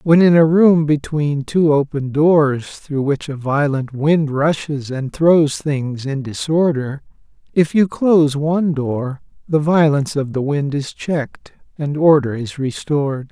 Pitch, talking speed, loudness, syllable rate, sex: 145 Hz, 160 wpm, -17 LUFS, 4.0 syllables/s, male